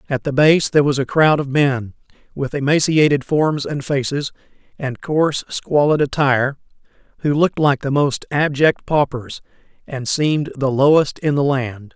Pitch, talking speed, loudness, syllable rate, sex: 140 Hz, 160 wpm, -17 LUFS, 4.8 syllables/s, male